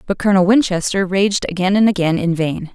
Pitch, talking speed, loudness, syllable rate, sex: 185 Hz, 195 wpm, -16 LUFS, 5.8 syllables/s, female